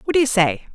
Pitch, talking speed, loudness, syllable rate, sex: 220 Hz, 325 wpm, -18 LUFS, 7.0 syllables/s, female